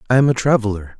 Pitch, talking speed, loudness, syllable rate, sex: 115 Hz, 240 wpm, -17 LUFS, 7.6 syllables/s, male